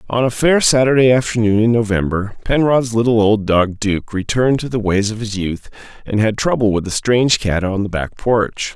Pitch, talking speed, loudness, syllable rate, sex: 110 Hz, 205 wpm, -16 LUFS, 5.2 syllables/s, male